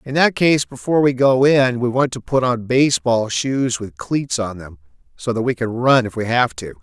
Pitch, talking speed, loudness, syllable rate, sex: 125 Hz, 240 wpm, -18 LUFS, 4.9 syllables/s, male